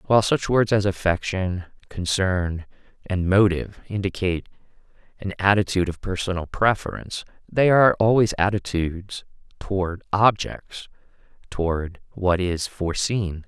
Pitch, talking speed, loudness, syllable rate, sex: 95 Hz, 100 wpm, -22 LUFS, 4.8 syllables/s, male